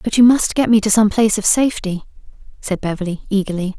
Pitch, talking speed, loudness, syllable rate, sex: 210 Hz, 205 wpm, -16 LUFS, 6.4 syllables/s, female